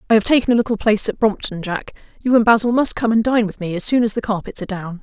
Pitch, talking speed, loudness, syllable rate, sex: 215 Hz, 285 wpm, -18 LUFS, 7.1 syllables/s, female